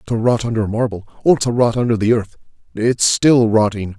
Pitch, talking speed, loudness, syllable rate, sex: 115 Hz, 180 wpm, -16 LUFS, 5.2 syllables/s, male